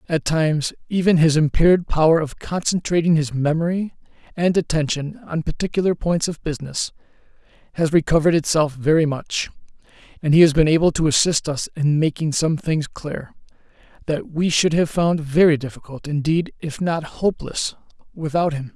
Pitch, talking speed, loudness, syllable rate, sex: 160 Hz, 155 wpm, -20 LUFS, 5.3 syllables/s, male